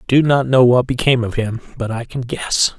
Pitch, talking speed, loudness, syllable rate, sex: 125 Hz, 260 wpm, -17 LUFS, 5.5 syllables/s, male